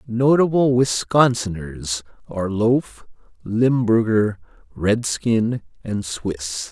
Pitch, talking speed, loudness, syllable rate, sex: 110 Hz, 70 wpm, -20 LUFS, 3.2 syllables/s, male